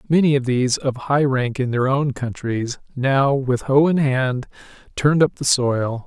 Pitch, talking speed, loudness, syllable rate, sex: 135 Hz, 190 wpm, -19 LUFS, 4.4 syllables/s, male